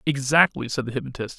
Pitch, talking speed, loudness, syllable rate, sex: 135 Hz, 175 wpm, -22 LUFS, 6.3 syllables/s, male